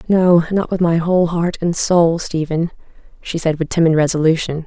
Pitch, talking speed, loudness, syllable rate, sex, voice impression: 170 Hz, 180 wpm, -16 LUFS, 5.1 syllables/s, female, feminine, adult-like, tensed, powerful, soft, slightly muffled, intellectual, calm, reassuring, elegant, lively, kind